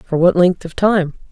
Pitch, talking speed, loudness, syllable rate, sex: 175 Hz, 230 wpm, -15 LUFS, 4.2 syllables/s, female